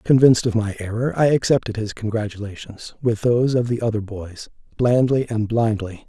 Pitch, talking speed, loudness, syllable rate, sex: 115 Hz, 170 wpm, -20 LUFS, 5.3 syllables/s, male